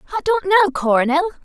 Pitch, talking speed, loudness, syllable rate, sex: 345 Hz, 165 wpm, -17 LUFS, 6.3 syllables/s, female